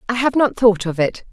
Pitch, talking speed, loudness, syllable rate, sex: 220 Hz, 275 wpm, -17 LUFS, 5.5 syllables/s, female